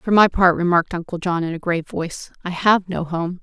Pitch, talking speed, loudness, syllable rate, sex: 175 Hz, 245 wpm, -19 LUFS, 5.8 syllables/s, female